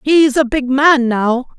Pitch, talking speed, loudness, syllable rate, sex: 270 Hz, 190 wpm, -13 LUFS, 3.6 syllables/s, female